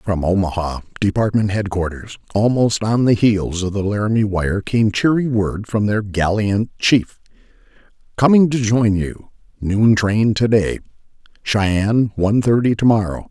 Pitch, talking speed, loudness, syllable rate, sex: 105 Hz, 135 wpm, -17 LUFS, 4.4 syllables/s, male